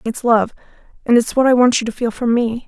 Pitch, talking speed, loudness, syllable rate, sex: 235 Hz, 270 wpm, -16 LUFS, 5.8 syllables/s, female